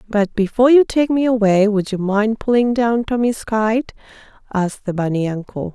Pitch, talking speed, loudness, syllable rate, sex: 215 Hz, 180 wpm, -17 LUFS, 5.0 syllables/s, female